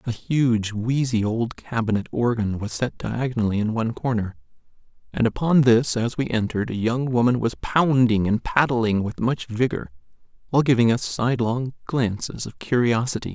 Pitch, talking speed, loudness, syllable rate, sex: 120 Hz, 155 wpm, -22 LUFS, 5.0 syllables/s, male